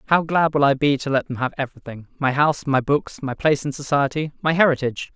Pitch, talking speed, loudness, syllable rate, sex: 140 Hz, 220 wpm, -21 LUFS, 6.5 syllables/s, male